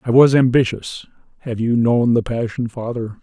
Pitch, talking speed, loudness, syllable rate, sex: 120 Hz, 150 wpm, -17 LUFS, 4.8 syllables/s, male